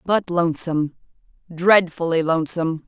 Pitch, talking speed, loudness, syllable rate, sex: 170 Hz, 65 wpm, -20 LUFS, 5.3 syllables/s, female